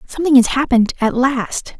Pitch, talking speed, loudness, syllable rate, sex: 255 Hz, 165 wpm, -15 LUFS, 5.8 syllables/s, female